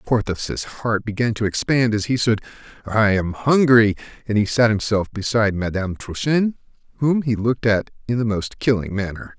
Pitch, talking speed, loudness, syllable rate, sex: 110 Hz, 175 wpm, -20 LUFS, 5.1 syllables/s, male